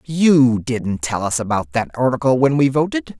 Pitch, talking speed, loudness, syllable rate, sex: 130 Hz, 190 wpm, -17 LUFS, 4.6 syllables/s, male